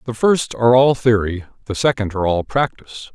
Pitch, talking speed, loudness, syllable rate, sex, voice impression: 115 Hz, 190 wpm, -17 LUFS, 5.8 syllables/s, male, masculine, middle-aged, thick, tensed, powerful, hard, fluent, intellectual, sincere, mature, wild, lively, strict